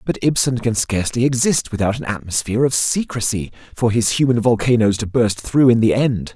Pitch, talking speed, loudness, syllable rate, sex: 115 Hz, 190 wpm, -17 LUFS, 5.5 syllables/s, male